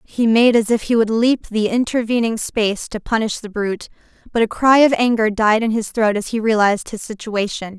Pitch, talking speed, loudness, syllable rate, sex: 220 Hz, 215 wpm, -17 LUFS, 5.4 syllables/s, female